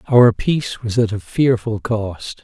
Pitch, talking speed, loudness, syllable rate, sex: 115 Hz, 175 wpm, -18 LUFS, 4.0 syllables/s, male